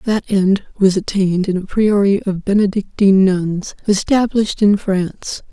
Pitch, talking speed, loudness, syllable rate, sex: 195 Hz, 140 wpm, -16 LUFS, 4.8 syllables/s, female